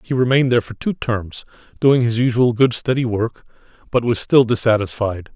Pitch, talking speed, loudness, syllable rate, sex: 120 Hz, 180 wpm, -18 LUFS, 5.4 syllables/s, male